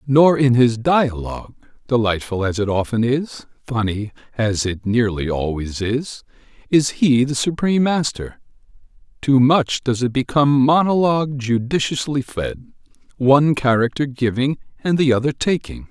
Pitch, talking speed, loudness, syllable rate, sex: 125 Hz, 130 wpm, -18 LUFS, 4.6 syllables/s, male